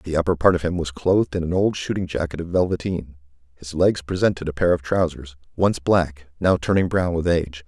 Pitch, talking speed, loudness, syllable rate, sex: 85 Hz, 220 wpm, -21 LUFS, 5.6 syllables/s, male